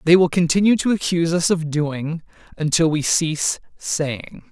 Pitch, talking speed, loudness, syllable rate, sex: 165 Hz, 160 wpm, -19 LUFS, 4.7 syllables/s, male